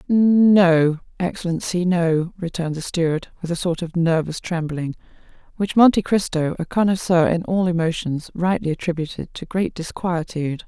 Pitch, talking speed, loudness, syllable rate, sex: 170 Hz, 140 wpm, -20 LUFS, 4.8 syllables/s, female